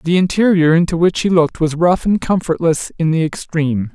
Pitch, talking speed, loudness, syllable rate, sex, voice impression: 165 Hz, 200 wpm, -15 LUFS, 5.6 syllables/s, male, masculine, adult-like, tensed, powerful, bright, clear, slightly halting, friendly, unique, lively, slightly intense